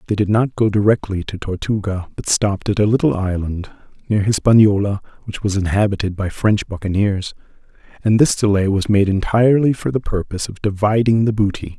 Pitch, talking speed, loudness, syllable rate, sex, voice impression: 105 Hz, 175 wpm, -17 LUFS, 5.6 syllables/s, male, very masculine, very adult-like, very middle-aged, very thick, relaxed, slightly weak, dark, soft, muffled, fluent, cool, intellectual, very sincere, very calm, very friendly, very reassuring, slightly unique, very elegant, sweet, slightly lively, very kind, modest